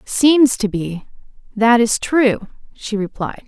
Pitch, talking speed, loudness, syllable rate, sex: 230 Hz, 120 wpm, -16 LUFS, 3.4 syllables/s, female